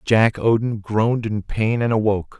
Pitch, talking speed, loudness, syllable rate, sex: 110 Hz, 175 wpm, -20 LUFS, 4.8 syllables/s, male